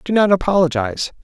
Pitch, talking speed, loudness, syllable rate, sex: 170 Hz, 145 wpm, -17 LUFS, 6.8 syllables/s, male